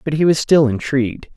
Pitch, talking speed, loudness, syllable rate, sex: 140 Hz, 220 wpm, -16 LUFS, 5.7 syllables/s, male